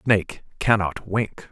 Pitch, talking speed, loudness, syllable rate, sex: 100 Hz, 120 wpm, -23 LUFS, 3.7 syllables/s, male